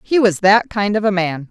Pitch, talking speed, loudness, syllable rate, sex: 200 Hz, 280 wpm, -15 LUFS, 5.0 syllables/s, female